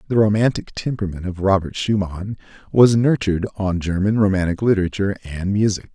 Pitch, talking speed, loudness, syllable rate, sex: 100 Hz, 140 wpm, -19 LUFS, 6.0 syllables/s, male